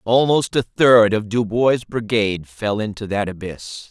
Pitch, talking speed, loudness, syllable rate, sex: 110 Hz, 155 wpm, -18 LUFS, 4.2 syllables/s, male